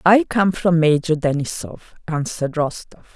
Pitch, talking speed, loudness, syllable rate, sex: 165 Hz, 135 wpm, -19 LUFS, 4.7 syllables/s, female